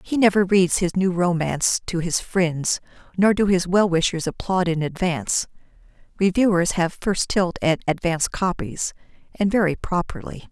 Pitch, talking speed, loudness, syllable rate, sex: 180 Hz, 155 wpm, -21 LUFS, 4.8 syllables/s, female